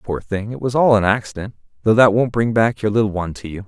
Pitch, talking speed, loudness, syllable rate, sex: 110 Hz, 260 wpm, -17 LUFS, 6.4 syllables/s, male